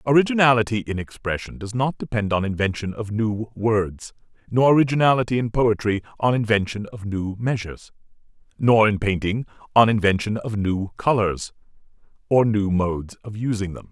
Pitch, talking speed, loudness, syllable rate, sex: 110 Hz, 145 wpm, -21 LUFS, 5.3 syllables/s, male